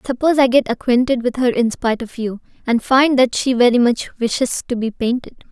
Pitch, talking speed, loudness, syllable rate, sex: 245 Hz, 220 wpm, -17 LUFS, 5.5 syllables/s, female